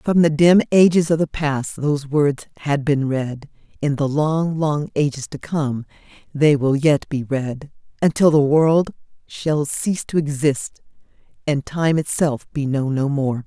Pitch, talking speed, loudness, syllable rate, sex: 145 Hz, 170 wpm, -19 LUFS, 4.1 syllables/s, female